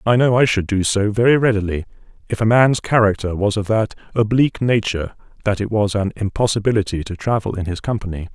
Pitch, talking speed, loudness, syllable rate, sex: 105 Hz, 195 wpm, -18 LUFS, 6.1 syllables/s, male